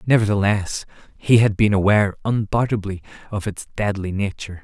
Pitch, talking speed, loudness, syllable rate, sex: 100 Hz, 130 wpm, -20 LUFS, 5.6 syllables/s, male